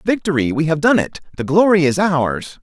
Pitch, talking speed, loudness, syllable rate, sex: 165 Hz, 205 wpm, -16 LUFS, 5.1 syllables/s, male